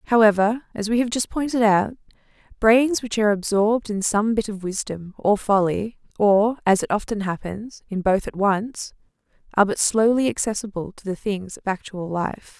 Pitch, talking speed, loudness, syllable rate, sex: 210 Hz, 175 wpm, -21 LUFS, 5.0 syllables/s, female